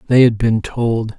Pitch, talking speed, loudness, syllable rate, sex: 115 Hz, 205 wpm, -16 LUFS, 4.0 syllables/s, male